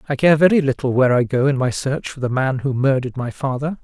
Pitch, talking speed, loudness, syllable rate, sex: 135 Hz, 265 wpm, -18 LUFS, 6.3 syllables/s, male